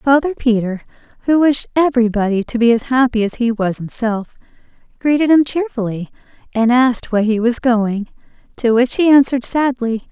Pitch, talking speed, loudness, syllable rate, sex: 240 Hz, 160 wpm, -16 LUFS, 5.4 syllables/s, female